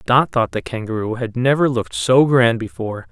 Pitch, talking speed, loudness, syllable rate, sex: 120 Hz, 195 wpm, -18 LUFS, 5.4 syllables/s, male